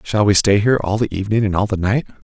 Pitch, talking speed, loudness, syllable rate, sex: 105 Hz, 285 wpm, -17 LUFS, 6.8 syllables/s, male